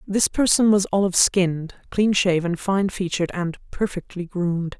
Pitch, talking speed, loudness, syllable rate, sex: 185 Hz, 150 wpm, -21 LUFS, 5.0 syllables/s, female